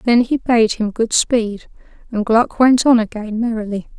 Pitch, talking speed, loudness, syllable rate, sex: 225 Hz, 180 wpm, -16 LUFS, 4.3 syllables/s, female